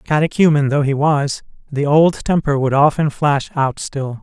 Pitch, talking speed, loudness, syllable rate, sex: 145 Hz, 170 wpm, -16 LUFS, 4.4 syllables/s, male